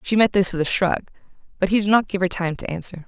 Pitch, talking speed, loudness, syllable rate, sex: 190 Hz, 290 wpm, -20 LUFS, 6.4 syllables/s, female